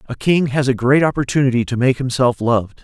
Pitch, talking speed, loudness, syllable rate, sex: 130 Hz, 210 wpm, -16 LUFS, 5.9 syllables/s, male